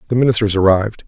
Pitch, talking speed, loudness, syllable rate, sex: 105 Hz, 165 wpm, -15 LUFS, 8.2 syllables/s, male